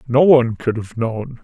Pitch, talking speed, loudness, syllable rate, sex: 120 Hz, 210 wpm, -17 LUFS, 4.8 syllables/s, male